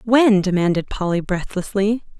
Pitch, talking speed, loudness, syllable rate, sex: 200 Hz, 110 wpm, -19 LUFS, 4.6 syllables/s, female